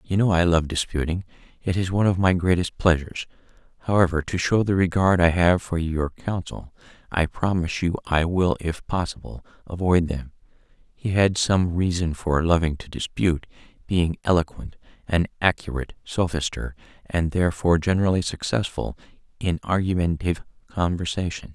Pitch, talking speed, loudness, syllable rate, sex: 90 Hz, 140 wpm, -23 LUFS, 5.3 syllables/s, male